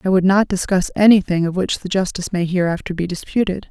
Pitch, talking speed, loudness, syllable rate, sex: 185 Hz, 210 wpm, -18 LUFS, 6.2 syllables/s, female